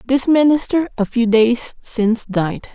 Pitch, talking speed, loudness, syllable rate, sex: 245 Hz, 155 wpm, -17 LUFS, 4.0 syllables/s, female